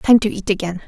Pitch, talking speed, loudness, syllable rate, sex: 205 Hz, 275 wpm, -18 LUFS, 6.3 syllables/s, female